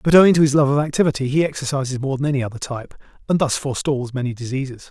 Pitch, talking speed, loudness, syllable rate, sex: 135 Hz, 230 wpm, -19 LUFS, 7.6 syllables/s, male